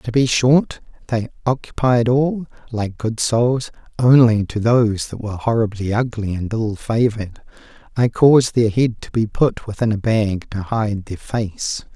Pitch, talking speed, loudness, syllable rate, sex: 115 Hz, 165 wpm, -18 LUFS, 4.4 syllables/s, male